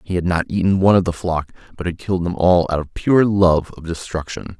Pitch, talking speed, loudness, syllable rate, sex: 90 Hz, 250 wpm, -18 LUFS, 5.8 syllables/s, male